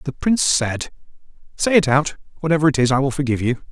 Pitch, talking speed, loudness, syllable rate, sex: 145 Hz, 210 wpm, -19 LUFS, 6.7 syllables/s, male